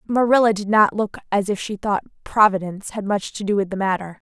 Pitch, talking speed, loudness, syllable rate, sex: 205 Hz, 220 wpm, -20 LUFS, 5.9 syllables/s, female